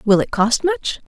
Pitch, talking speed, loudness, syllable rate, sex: 215 Hz, 210 wpm, -18 LUFS, 4.3 syllables/s, female